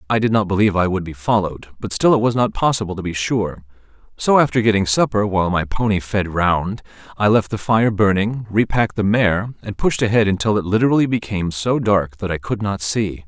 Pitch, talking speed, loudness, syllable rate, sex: 105 Hz, 215 wpm, -18 LUFS, 5.8 syllables/s, male